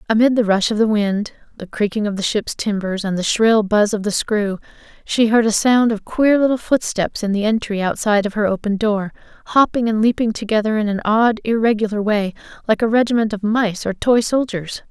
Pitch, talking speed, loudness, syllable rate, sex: 215 Hz, 210 wpm, -18 LUFS, 5.4 syllables/s, female